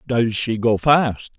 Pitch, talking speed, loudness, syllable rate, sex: 115 Hz, 175 wpm, -18 LUFS, 3.3 syllables/s, male